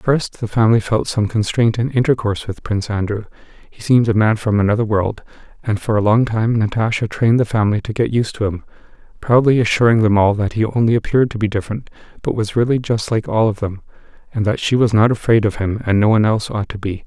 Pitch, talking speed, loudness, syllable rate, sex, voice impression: 110 Hz, 235 wpm, -17 LUFS, 6.4 syllables/s, male, masculine, adult-like, slightly muffled, sincere, calm, kind